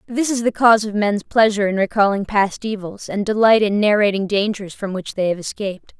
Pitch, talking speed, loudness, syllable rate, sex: 205 Hz, 210 wpm, -18 LUFS, 5.7 syllables/s, female